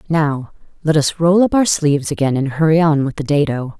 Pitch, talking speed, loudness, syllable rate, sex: 150 Hz, 220 wpm, -16 LUFS, 5.4 syllables/s, female